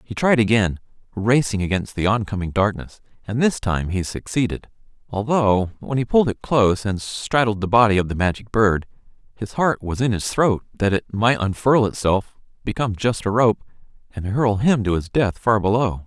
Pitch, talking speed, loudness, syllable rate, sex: 105 Hz, 185 wpm, -20 LUFS, 5.1 syllables/s, male